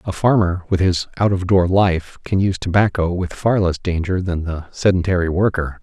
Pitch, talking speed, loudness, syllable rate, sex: 90 Hz, 195 wpm, -18 LUFS, 5.1 syllables/s, male